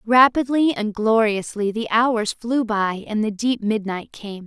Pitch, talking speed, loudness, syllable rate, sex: 220 Hz, 160 wpm, -20 LUFS, 4.0 syllables/s, female